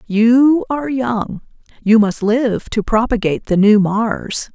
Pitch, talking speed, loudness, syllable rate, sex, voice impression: 225 Hz, 145 wpm, -15 LUFS, 3.8 syllables/s, female, feminine, adult-like, tensed, powerful, bright, clear, intellectual, friendly, elegant, lively, slightly strict, slightly sharp